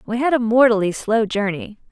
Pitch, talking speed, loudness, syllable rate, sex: 225 Hz, 190 wpm, -18 LUFS, 5.4 syllables/s, female